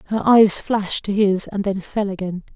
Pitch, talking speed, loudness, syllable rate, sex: 200 Hz, 210 wpm, -18 LUFS, 4.9 syllables/s, female